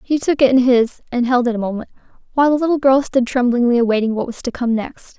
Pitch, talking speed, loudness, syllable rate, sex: 250 Hz, 255 wpm, -17 LUFS, 6.4 syllables/s, female